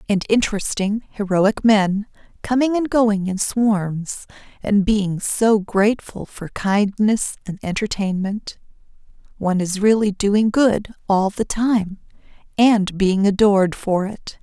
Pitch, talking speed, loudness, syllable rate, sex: 205 Hz, 120 wpm, -19 LUFS, 3.8 syllables/s, female